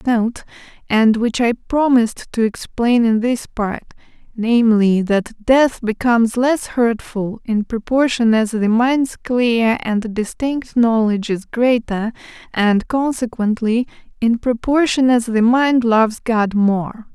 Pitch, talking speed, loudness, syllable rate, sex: 230 Hz, 130 wpm, -17 LUFS, 3.8 syllables/s, female